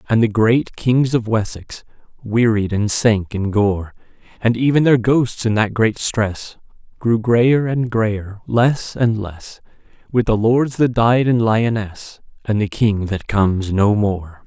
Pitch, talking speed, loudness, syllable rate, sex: 110 Hz, 165 wpm, -17 LUFS, 3.8 syllables/s, male